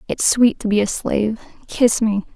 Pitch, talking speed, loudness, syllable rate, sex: 220 Hz, 205 wpm, -18 LUFS, 4.8 syllables/s, female